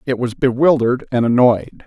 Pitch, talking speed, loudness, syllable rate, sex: 125 Hz, 160 wpm, -16 LUFS, 5.4 syllables/s, male